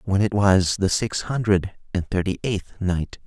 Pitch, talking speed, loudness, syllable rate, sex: 95 Hz, 185 wpm, -22 LUFS, 4.4 syllables/s, male